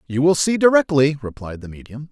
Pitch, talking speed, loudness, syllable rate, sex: 145 Hz, 200 wpm, -17 LUFS, 5.8 syllables/s, male